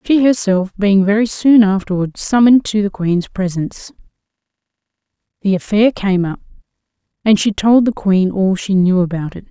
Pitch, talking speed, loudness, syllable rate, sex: 200 Hz, 160 wpm, -14 LUFS, 5.0 syllables/s, female